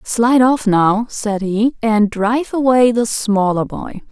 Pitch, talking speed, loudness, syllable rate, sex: 225 Hz, 160 wpm, -15 LUFS, 3.9 syllables/s, female